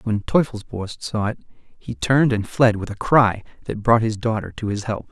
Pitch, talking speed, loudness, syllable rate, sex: 110 Hz, 210 wpm, -21 LUFS, 4.8 syllables/s, male